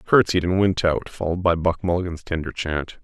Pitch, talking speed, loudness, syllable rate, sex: 90 Hz, 215 wpm, -22 LUFS, 6.1 syllables/s, male